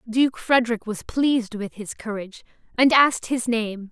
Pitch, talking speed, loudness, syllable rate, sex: 230 Hz, 170 wpm, -22 LUFS, 4.9 syllables/s, female